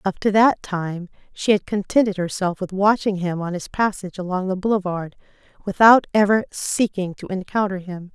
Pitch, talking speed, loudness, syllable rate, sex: 190 Hz, 170 wpm, -20 LUFS, 5.1 syllables/s, female